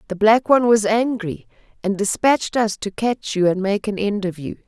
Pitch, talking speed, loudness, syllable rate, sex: 210 Hz, 220 wpm, -19 LUFS, 5.2 syllables/s, female